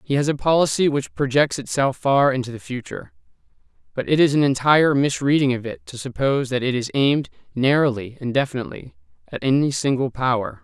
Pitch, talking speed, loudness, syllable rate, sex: 135 Hz, 180 wpm, -20 LUFS, 6.1 syllables/s, male